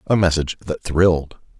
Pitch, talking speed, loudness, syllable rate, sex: 85 Hz, 150 wpm, -19 LUFS, 5.5 syllables/s, male